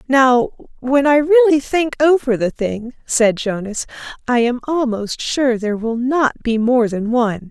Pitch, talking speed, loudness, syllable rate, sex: 250 Hz, 170 wpm, -16 LUFS, 4.1 syllables/s, female